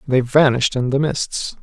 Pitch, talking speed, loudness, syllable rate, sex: 135 Hz, 185 wpm, -17 LUFS, 4.8 syllables/s, male